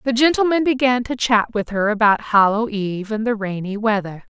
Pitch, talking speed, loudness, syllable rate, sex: 225 Hz, 195 wpm, -18 LUFS, 5.4 syllables/s, female